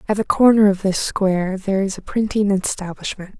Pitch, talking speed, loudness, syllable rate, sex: 195 Hz, 195 wpm, -19 LUFS, 5.6 syllables/s, female